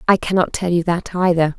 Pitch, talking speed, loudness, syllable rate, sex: 175 Hz, 225 wpm, -18 LUFS, 5.6 syllables/s, female